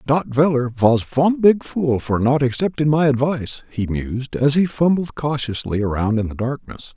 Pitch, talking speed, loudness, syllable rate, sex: 135 Hz, 180 wpm, -19 LUFS, 4.8 syllables/s, male